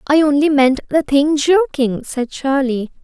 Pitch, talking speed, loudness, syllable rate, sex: 285 Hz, 160 wpm, -15 LUFS, 4.1 syllables/s, female